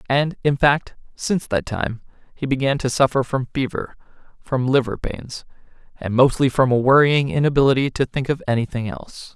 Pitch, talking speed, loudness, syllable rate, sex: 135 Hz, 165 wpm, -20 LUFS, 5.2 syllables/s, male